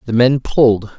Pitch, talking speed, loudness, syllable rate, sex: 120 Hz, 185 wpm, -14 LUFS, 5.0 syllables/s, male